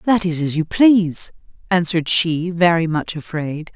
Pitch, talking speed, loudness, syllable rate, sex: 170 Hz, 160 wpm, -18 LUFS, 4.6 syllables/s, female